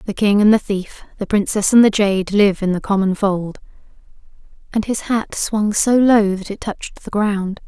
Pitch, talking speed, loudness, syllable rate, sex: 205 Hz, 205 wpm, -17 LUFS, 4.7 syllables/s, female